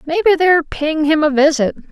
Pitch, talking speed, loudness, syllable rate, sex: 310 Hz, 220 wpm, -14 LUFS, 5.9 syllables/s, female